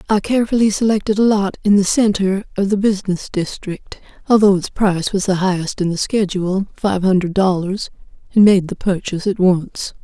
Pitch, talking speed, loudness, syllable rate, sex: 195 Hz, 165 wpm, -17 LUFS, 5.5 syllables/s, female